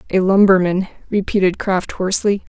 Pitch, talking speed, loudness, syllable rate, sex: 190 Hz, 120 wpm, -17 LUFS, 5.3 syllables/s, female